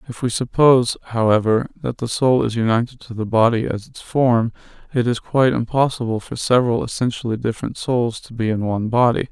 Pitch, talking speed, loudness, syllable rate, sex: 120 Hz, 185 wpm, -19 LUFS, 5.9 syllables/s, male